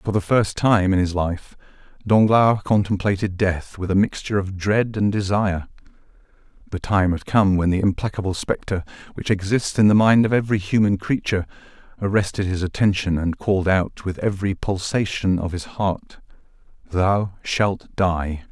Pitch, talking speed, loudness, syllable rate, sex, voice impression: 100 Hz, 160 wpm, -21 LUFS, 5.0 syllables/s, male, very masculine, slightly old, very thick, slightly relaxed, very powerful, slightly dark, slightly soft, muffled, slightly fluent, slightly raspy, cool, intellectual, refreshing, slightly sincere, calm, very mature, very friendly, reassuring, very unique, elegant, very wild, sweet, lively, slightly strict, slightly intense, slightly modest